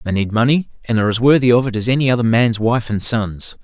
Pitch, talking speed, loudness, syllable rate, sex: 115 Hz, 265 wpm, -16 LUFS, 6.2 syllables/s, male